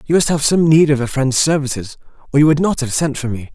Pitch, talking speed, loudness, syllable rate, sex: 145 Hz, 285 wpm, -15 LUFS, 6.2 syllables/s, male